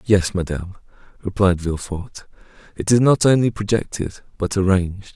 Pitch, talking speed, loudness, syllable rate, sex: 95 Hz, 130 wpm, -20 LUFS, 5.2 syllables/s, male